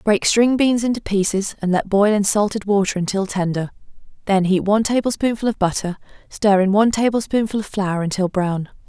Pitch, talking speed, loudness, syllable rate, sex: 205 Hz, 180 wpm, -19 LUFS, 5.5 syllables/s, female